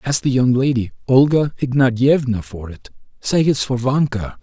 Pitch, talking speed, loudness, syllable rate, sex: 125 Hz, 165 wpm, -17 LUFS, 4.8 syllables/s, male